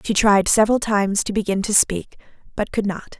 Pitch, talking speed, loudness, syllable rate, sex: 205 Hz, 205 wpm, -19 LUFS, 5.5 syllables/s, female